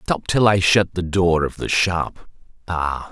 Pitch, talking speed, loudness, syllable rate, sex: 90 Hz, 190 wpm, -19 LUFS, 3.7 syllables/s, male